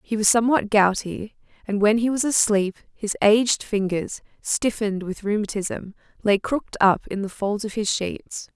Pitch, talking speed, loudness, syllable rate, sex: 210 Hz, 170 wpm, -22 LUFS, 4.8 syllables/s, female